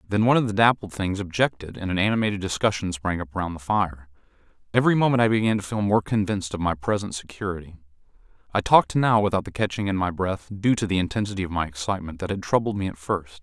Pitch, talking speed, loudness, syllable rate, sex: 100 Hz, 225 wpm, -24 LUFS, 6.6 syllables/s, male